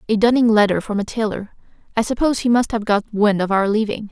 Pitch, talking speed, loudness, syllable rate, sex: 215 Hz, 235 wpm, -18 LUFS, 6.4 syllables/s, female